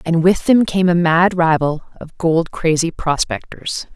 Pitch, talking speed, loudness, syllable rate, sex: 170 Hz, 165 wpm, -16 LUFS, 4.0 syllables/s, female